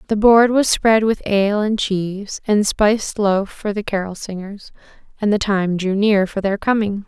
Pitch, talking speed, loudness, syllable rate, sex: 205 Hz, 195 wpm, -18 LUFS, 4.6 syllables/s, female